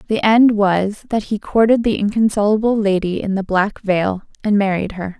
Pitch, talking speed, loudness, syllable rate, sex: 205 Hz, 185 wpm, -17 LUFS, 4.8 syllables/s, female